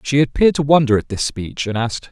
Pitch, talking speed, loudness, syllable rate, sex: 130 Hz, 255 wpm, -17 LUFS, 6.5 syllables/s, male